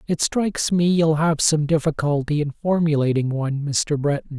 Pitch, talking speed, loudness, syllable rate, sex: 155 Hz, 165 wpm, -20 LUFS, 5.0 syllables/s, male